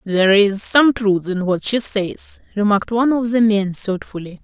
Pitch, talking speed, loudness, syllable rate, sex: 210 Hz, 190 wpm, -17 LUFS, 4.8 syllables/s, female